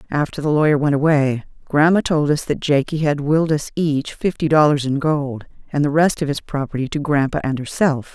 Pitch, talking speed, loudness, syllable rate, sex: 145 Hz, 205 wpm, -18 LUFS, 5.4 syllables/s, female